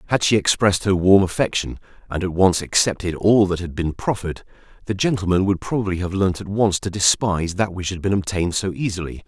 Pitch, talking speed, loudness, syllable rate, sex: 95 Hz, 205 wpm, -20 LUFS, 6.0 syllables/s, male